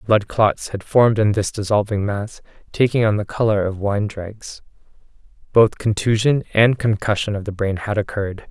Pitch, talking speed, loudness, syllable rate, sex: 105 Hz, 170 wpm, -19 LUFS, 4.9 syllables/s, male